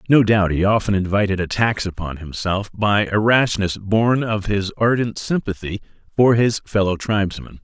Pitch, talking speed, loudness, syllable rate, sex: 105 Hz, 155 wpm, -19 LUFS, 4.7 syllables/s, male